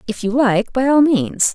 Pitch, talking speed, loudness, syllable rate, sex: 235 Hz, 195 wpm, -16 LUFS, 4.3 syllables/s, female